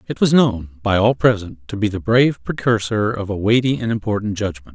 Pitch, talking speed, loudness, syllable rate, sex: 105 Hz, 215 wpm, -18 LUFS, 5.5 syllables/s, male